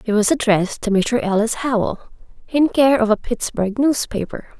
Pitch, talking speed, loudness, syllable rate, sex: 230 Hz, 170 wpm, -18 LUFS, 5.0 syllables/s, female